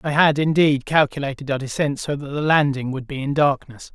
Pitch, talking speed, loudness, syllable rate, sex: 140 Hz, 215 wpm, -20 LUFS, 5.5 syllables/s, male